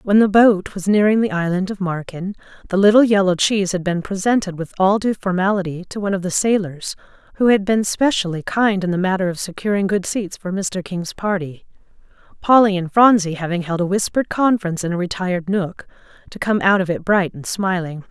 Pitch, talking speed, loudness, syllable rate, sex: 190 Hz, 200 wpm, -18 LUFS, 5.7 syllables/s, female